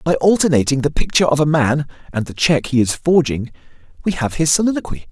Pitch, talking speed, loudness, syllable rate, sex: 145 Hz, 200 wpm, -17 LUFS, 6.2 syllables/s, male